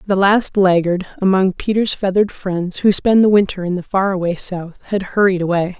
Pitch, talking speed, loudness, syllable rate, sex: 190 Hz, 195 wpm, -16 LUFS, 5.2 syllables/s, female